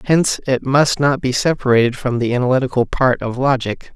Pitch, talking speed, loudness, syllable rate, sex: 130 Hz, 180 wpm, -17 LUFS, 5.5 syllables/s, male